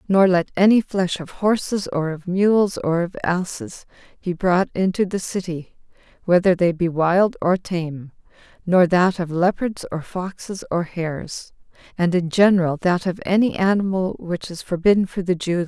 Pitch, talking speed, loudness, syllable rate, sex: 180 Hz, 175 wpm, -20 LUFS, 4.6 syllables/s, female